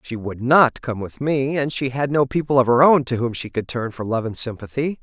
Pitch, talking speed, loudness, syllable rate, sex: 130 Hz, 275 wpm, -20 LUFS, 5.3 syllables/s, male